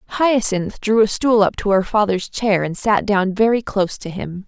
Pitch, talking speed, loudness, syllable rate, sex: 205 Hz, 215 wpm, -18 LUFS, 4.5 syllables/s, female